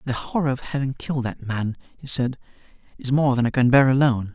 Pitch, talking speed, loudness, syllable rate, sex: 130 Hz, 220 wpm, -22 LUFS, 6.0 syllables/s, male